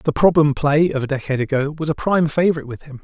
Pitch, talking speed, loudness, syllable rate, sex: 150 Hz, 255 wpm, -18 LUFS, 7.3 syllables/s, male